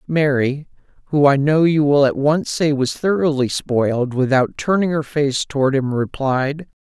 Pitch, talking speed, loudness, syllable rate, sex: 145 Hz, 165 wpm, -18 LUFS, 4.4 syllables/s, male